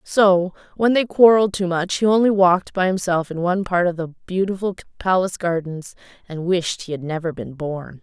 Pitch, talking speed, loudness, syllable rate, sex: 180 Hz, 195 wpm, -19 LUFS, 5.3 syllables/s, female